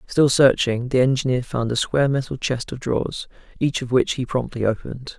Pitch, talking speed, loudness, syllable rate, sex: 130 Hz, 195 wpm, -21 LUFS, 5.5 syllables/s, male